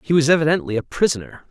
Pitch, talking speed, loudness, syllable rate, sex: 140 Hz, 200 wpm, -19 LUFS, 7.3 syllables/s, male